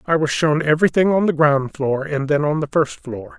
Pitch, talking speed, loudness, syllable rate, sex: 150 Hz, 250 wpm, -18 LUFS, 5.2 syllables/s, male